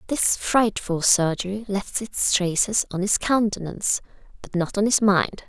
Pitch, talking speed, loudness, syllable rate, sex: 200 Hz, 155 wpm, -22 LUFS, 4.4 syllables/s, female